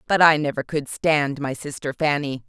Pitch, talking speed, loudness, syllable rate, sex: 145 Hz, 195 wpm, -22 LUFS, 4.8 syllables/s, female